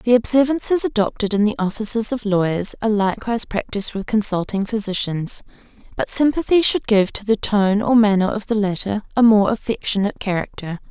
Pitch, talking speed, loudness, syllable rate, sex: 210 Hz, 165 wpm, -19 LUFS, 5.8 syllables/s, female